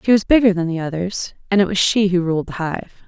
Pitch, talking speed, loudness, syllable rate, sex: 190 Hz, 275 wpm, -18 LUFS, 5.8 syllables/s, female